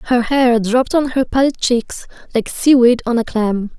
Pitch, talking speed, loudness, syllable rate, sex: 245 Hz, 205 wpm, -15 LUFS, 4.4 syllables/s, female